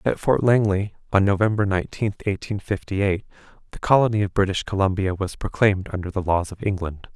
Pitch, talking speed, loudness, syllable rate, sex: 100 Hz, 175 wpm, -22 LUFS, 5.8 syllables/s, male